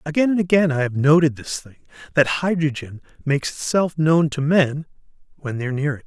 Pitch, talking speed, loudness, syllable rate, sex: 150 Hz, 200 wpm, -20 LUFS, 5.8 syllables/s, male